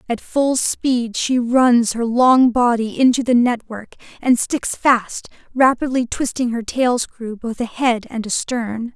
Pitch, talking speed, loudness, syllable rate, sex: 240 Hz, 155 wpm, -18 LUFS, 3.8 syllables/s, female